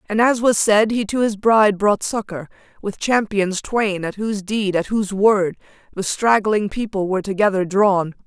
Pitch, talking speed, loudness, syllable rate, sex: 205 Hz, 180 wpm, -18 LUFS, 4.8 syllables/s, female